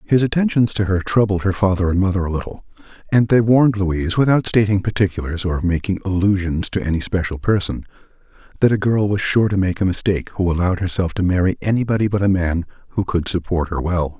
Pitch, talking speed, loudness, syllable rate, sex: 95 Hz, 205 wpm, -18 LUFS, 6.2 syllables/s, male